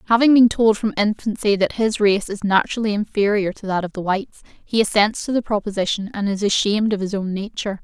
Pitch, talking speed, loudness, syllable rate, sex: 210 Hz, 215 wpm, -19 LUFS, 6.1 syllables/s, female